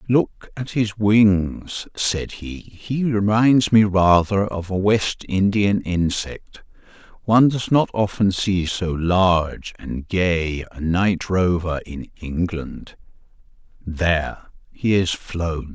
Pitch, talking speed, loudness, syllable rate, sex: 95 Hz, 125 wpm, -20 LUFS, 3.2 syllables/s, male